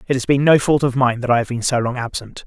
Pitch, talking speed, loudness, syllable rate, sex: 130 Hz, 340 wpm, -17 LUFS, 6.4 syllables/s, male